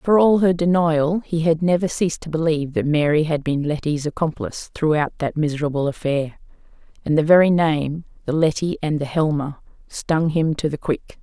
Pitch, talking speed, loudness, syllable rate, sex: 155 Hz, 170 wpm, -20 LUFS, 5.2 syllables/s, female